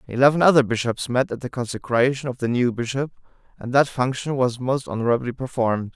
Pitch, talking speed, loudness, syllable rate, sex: 125 Hz, 180 wpm, -22 LUFS, 6.0 syllables/s, male